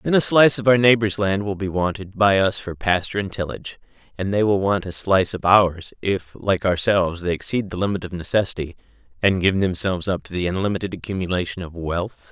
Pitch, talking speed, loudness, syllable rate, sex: 95 Hz, 210 wpm, -21 LUFS, 5.9 syllables/s, male